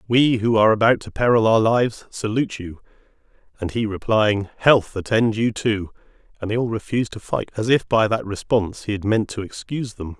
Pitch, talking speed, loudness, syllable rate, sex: 110 Hz, 195 wpm, -20 LUFS, 5.5 syllables/s, male